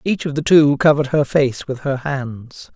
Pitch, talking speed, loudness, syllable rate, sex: 140 Hz, 220 wpm, -17 LUFS, 4.5 syllables/s, male